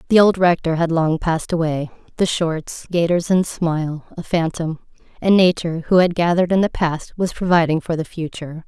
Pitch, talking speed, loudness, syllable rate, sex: 170 Hz, 180 wpm, -19 LUFS, 5.5 syllables/s, female